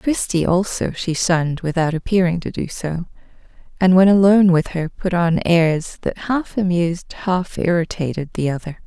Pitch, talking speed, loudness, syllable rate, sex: 175 Hz, 160 wpm, -18 LUFS, 4.7 syllables/s, female